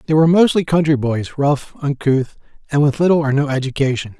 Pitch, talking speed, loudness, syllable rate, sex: 145 Hz, 185 wpm, -17 LUFS, 5.8 syllables/s, male